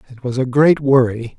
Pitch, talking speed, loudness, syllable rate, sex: 130 Hz, 215 wpm, -15 LUFS, 5.2 syllables/s, male